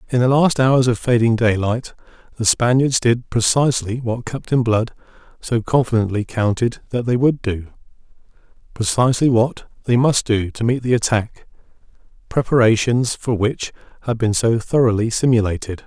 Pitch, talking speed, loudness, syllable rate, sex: 120 Hz, 140 wpm, -18 LUFS, 5.0 syllables/s, male